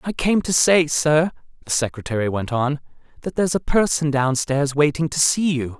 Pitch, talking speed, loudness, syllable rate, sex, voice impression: 150 Hz, 185 wpm, -20 LUFS, 5.1 syllables/s, male, masculine, adult-like, sincere, slightly calm, friendly